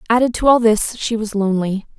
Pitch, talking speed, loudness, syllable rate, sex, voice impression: 220 Hz, 210 wpm, -17 LUFS, 6.0 syllables/s, female, feminine, adult-like, relaxed, weak, soft, slightly raspy, calm, reassuring, elegant, kind, modest